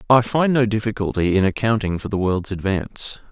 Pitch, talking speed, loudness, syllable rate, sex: 105 Hz, 180 wpm, -20 LUFS, 5.6 syllables/s, male